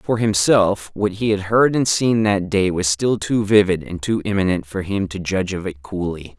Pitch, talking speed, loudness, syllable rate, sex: 100 Hz, 225 wpm, -19 LUFS, 4.8 syllables/s, male